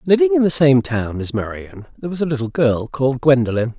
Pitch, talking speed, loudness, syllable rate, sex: 125 Hz, 220 wpm, -17 LUFS, 5.9 syllables/s, male